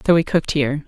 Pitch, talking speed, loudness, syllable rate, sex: 150 Hz, 275 wpm, -19 LUFS, 8.2 syllables/s, female